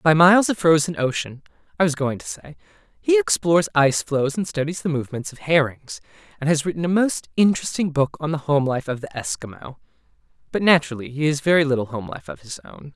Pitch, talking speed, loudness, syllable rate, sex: 145 Hz, 210 wpm, -21 LUFS, 6.1 syllables/s, male